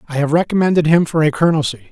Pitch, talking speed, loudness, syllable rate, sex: 155 Hz, 220 wpm, -15 LUFS, 7.8 syllables/s, male